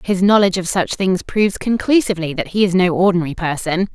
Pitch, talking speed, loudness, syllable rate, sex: 185 Hz, 200 wpm, -17 LUFS, 6.3 syllables/s, female